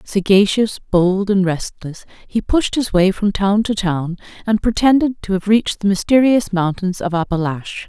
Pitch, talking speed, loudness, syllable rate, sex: 200 Hz, 170 wpm, -17 LUFS, 4.6 syllables/s, female